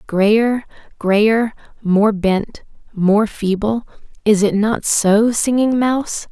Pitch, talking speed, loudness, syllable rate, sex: 215 Hz, 105 wpm, -16 LUFS, 3.1 syllables/s, female